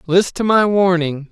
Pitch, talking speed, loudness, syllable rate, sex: 180 Hz, 180 wpm, -15 LUFS, 4.3 syllables/s, male